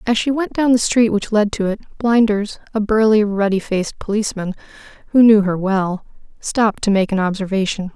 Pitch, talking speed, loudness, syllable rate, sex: 210 Hz, 190 wpm, -17 LUFS, 5.5 syllables/s, female